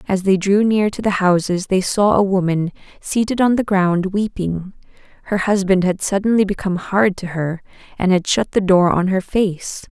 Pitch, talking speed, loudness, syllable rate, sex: 190 Hz, 195 wpm, -17 LUFS, 4.8 syllables/s, female